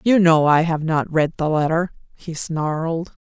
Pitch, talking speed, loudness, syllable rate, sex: 160 Hz, 185 wpm, -19 LUFS, 4.3 syllables/s, female